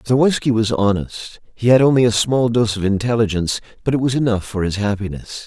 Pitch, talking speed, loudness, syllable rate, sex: 110 Hz, 200 wpm, -17 LUFS, 5.8 syllables/s, male